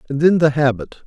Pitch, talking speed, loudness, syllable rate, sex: 145 Hz, 225 wpm, -16 LUFS, 6.3 syllables/s, male